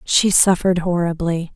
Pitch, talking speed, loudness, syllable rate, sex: 175 Hz, 115 wpm, -17 LUFS, 4.8 syllables/s, female